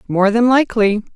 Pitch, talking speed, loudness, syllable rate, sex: 220 Hz, 155 wpm, -14 LUFS, 5.5 syllables/s, female